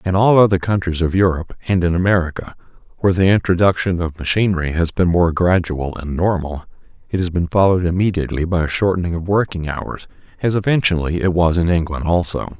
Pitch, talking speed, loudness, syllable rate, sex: 90 Hz, 180 wpm, -17 LUFS, 6.1 syllables/s, male